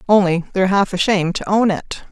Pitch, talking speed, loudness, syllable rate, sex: 190 Hz, 200 wpm, -17 LUFS, 6.3 syllables/s, female